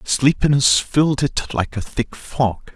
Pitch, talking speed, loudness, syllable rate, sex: 130 Hz, 155 wpm, -19 LUFS, 3.8 syllables/s, male